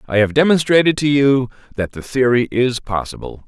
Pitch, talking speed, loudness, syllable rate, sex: 125 Hz, 175 wpm, -16 LUFS, 5.3 syllables/s, male